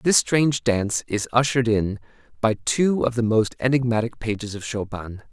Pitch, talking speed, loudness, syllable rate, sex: 115 Hz, 170 wpm, -22 LUFS, 5.1 syllables/s, male